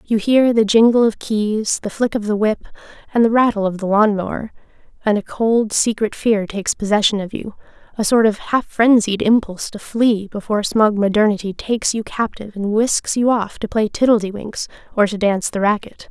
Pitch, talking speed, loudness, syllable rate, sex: 215 Hz, 190 wpm, -17 LUFS, 5.3 syllables/s, female